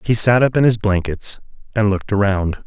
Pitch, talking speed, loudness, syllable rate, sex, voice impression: 105 Hz, 205 wpm, -17 LUFS, 5.4 syllables/s, male, very masculine, adult-like, slightly clear, cool, sincere, calm